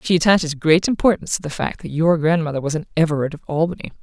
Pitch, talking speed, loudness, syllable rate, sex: 160 Hz, 225 wpm, -19 LUFS, 7.0 syllables/s, female